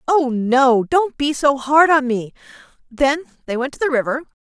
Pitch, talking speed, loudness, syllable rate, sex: 270 Hz, 190 wpm, -17 LUFS, 4.5 syllables/s, female